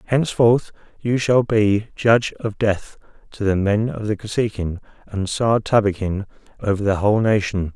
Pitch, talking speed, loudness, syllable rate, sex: 105 Hz, 155 wpm, -20 LUFS, 4.8 syllables/s, male